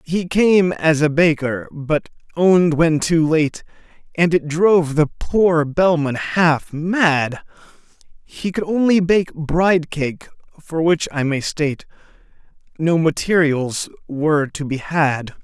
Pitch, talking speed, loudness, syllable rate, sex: 160 Hz, 130 wpm, -18 LUFS, 3.8 syllables/s, male